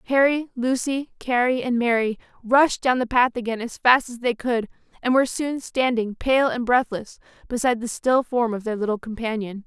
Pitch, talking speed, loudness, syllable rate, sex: 240 Hz, 185 wpm, -22 LUFS, 5.1 syllables/s, female